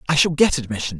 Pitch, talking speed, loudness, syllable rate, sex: 140 Hz, 240 wpm, -19 LUFS, 7.0 syllables/s, male